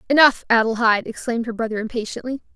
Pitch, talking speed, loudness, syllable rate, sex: 235 Hz, 140 wpm, -20 LUFS, 7.2 syllables/s, female